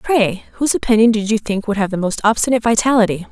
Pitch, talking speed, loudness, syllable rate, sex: 220 Hz, 215 wpm, -16 LUFS, 7.0 syllables/s, female